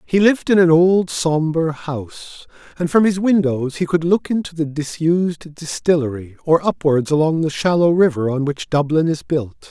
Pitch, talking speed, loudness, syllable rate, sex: 160 Hz, 180 wpm, -17 LUFS, 4.8 syllables/s, male